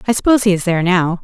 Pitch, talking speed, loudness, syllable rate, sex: 190 Hz, 290 wpm, -14 LUFS, 8.6 syllables/s, female